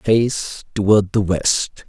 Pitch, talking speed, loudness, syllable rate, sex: 105 Hz, 130 wpm, -18 LUFS, 2.9 syllables/s, male